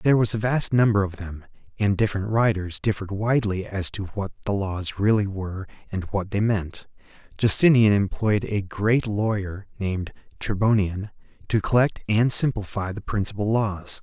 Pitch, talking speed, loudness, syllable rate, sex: 105 Hz, 165 wpm, -23 LUFS, 5.1 syllables/s, male